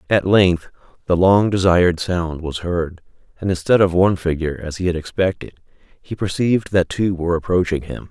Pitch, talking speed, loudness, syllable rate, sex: 90 Hz, 180 wpm, -18 LUFS, 5.4 syllables/s, male